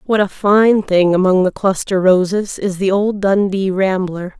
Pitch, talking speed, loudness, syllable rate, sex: 190 Hz, 175 wpm, -15 LUFS, 4.2 syllables/s, female